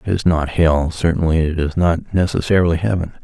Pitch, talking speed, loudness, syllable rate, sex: 85 Hz, 185 wpm, -17 LUFS, 5.6 syllables/s, male